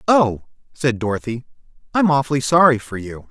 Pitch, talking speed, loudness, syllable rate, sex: 130 Hz, 145 wpm, -18 LUFS, 5.4 syllables/s, male